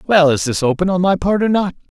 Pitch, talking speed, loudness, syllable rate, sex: 175 Hz, 275 wpm, -16 LUFS, 6.1 syllables/s, male